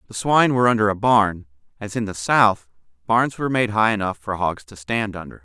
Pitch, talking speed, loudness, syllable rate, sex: 105 Hz, 220 wpm, -20 LUFS, 5.7 syllables/s, male